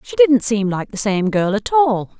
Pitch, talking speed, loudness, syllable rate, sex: 230 Hz, 245 wpm, -17 LUFS, 4.4 syllables/s, female